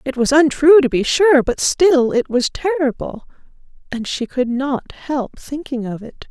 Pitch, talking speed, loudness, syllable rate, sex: 275 Hz, 180 wpm, -16 LUFS, 4.2 syllables/s, female